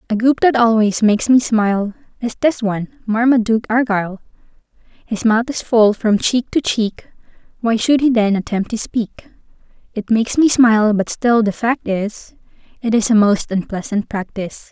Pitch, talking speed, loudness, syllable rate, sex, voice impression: 225 Hz, 170 wpm, -16 LUFS, 4.9 syllables/s, female, feminine, slightly young, tensed, slightly powerful, slightly soft, calm, friendly, reassuring, slightly kind